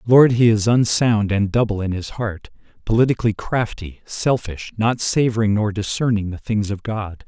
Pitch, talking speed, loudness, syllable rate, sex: 110 Hz, 165 wpm, -19 LUFS, 4.7 syllables/s, male